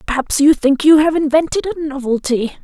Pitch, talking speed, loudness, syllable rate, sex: 280 Hz, 180 wpm, -14 LUFS, 5.5 syllables/s, female